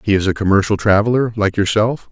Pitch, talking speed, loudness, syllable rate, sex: 105 Hz, 200 wpm, -16 LUFS, 6.2 syllables/s, male